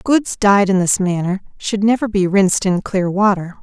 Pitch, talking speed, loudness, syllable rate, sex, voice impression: 195 Hz, 200 wpm, -16 LUFS, 4.8 syllables/s, female, feminine, adult-like, tensed, powerful, clear, slightly halting, intellectual, slightly calm, elegant, strict, slightly sharp